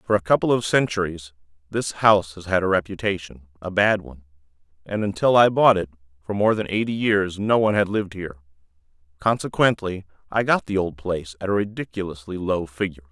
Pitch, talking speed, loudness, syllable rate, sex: 95 Hz, 185 wpm, -22 LUFS, 6.1 syllables/s, male